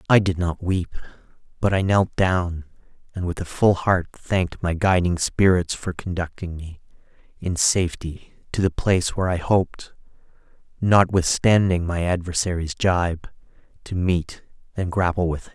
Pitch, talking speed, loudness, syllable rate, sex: 90 Hz, 145 wpm, -22 LUFS, 4.7 syllables/s, male